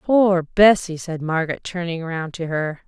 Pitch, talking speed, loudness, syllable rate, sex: 170 Hz, 165 wpm, -20 LUFS, 4.4 syllables/s, female